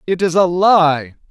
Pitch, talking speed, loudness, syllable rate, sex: 170 Hz, 185 wpm, -14 LUFS, 3.9 syllables/s, male